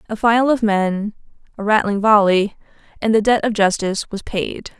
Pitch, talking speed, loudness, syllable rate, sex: 210 Hz, 175 wpm, -17 LUFS, 5.0 syllables/s, female